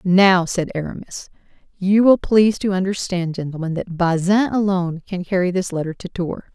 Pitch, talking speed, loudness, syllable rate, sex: 185 Hz, 165 wpm, -19 LUFS, 5.1 syllables/s, female